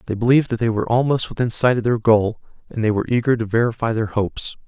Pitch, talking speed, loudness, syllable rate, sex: 115 Hz, 245 wpm, -19 LUFS, 7.0 syllables/s, male